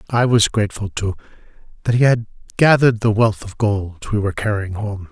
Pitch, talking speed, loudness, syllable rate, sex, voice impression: 105 Hz, 190 wpm, -18 LUFS, 5.6 syllables/s, male, very masculine, very adult-like, slightly old, thick, slightly tensed, powerful, slightly dark, slightly hard, muffled, fluent, very cool, very intellectual, sincere, very calm, very mature, friendly, very reassuring, unique, wild, slightly lively, kind, slightly intense